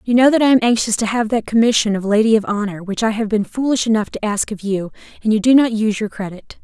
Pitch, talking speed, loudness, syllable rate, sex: 220 Hz, 280 wpm, -17 LUFS, 6.5 syllables/s, female